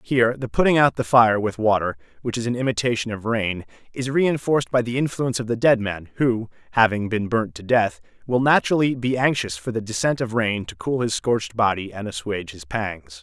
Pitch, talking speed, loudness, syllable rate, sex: 115 Hz, 215 wpm, -22 LUFS, 5.6 syllables/s, male